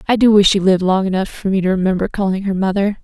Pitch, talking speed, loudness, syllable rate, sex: 195 Hz, 275 wpm, -15 LUFS, 7.0 syllables/s, female